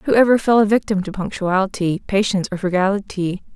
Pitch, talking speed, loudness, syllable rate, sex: 195 Hz, 170 wpm, -18 LUFS, 6.0 syllables/s, female